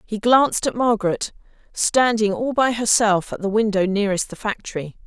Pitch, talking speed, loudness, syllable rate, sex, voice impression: 215 Hz, 165 wpm, -20 LUFS, 5.3 syllables/s, female, very feminine, very adult-like, thin, tensed, powerful, slightly bright, hard, very clear, fluent, slightly raspy, cool, very intellectual, refreshing, slightly sincere, calm, friendly, reassuring, very unique, elegant, wild, slightly sweet, lively, very strict, intense, slightly sharp, light